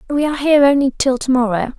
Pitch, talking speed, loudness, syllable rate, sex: 265 Hz, 235 wpm, -15 LUFS, 7.1 syllables/s, female